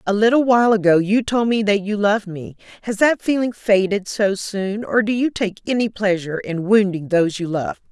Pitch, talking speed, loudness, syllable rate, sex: 205 Hz, 210 wpm, -18 LUFS, 5.3 syllables/s, female